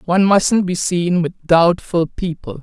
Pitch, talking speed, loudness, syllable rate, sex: 175 Hz, 160 wpm, -16 LUFS, 4.2 syllables/s, female